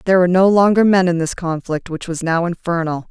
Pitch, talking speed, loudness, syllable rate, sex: 175 Hz, 230 wpm, -16 LUFS, 6.1 syllables/s, female